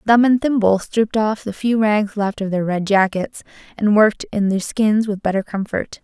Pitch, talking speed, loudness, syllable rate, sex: 210 Hz, 210 wpm, -18 LUFS, 4.9 syllables/s, female